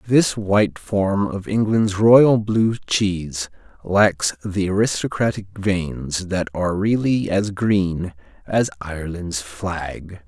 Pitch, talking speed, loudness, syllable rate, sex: 95 Hz, 115 wpm, -20 LUFS, 3.4 syllables/s, male